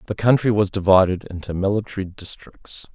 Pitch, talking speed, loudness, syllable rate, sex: 100 Hz, 145 wpm, -20 LUFS, 5.6 syllables/s, male